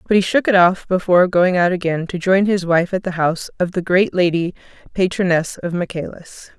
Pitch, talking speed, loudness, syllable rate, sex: 180 Hz, 210 wpm, -17 LUFS, 5.5 syllables/s, female